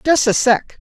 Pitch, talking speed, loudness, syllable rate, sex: 250 Hz, 205 wpm, -15 LUFS, 4.3 syllables/s, female